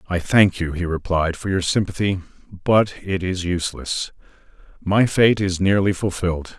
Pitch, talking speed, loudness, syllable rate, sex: 95 Hz, 155 wpm, -20 LUFS, 4.8 syllables/s, male